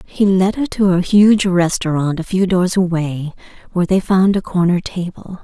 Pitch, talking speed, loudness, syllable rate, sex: 180 Hz, 190 wpm, -16 LUFS, 4.7 syllables/s, female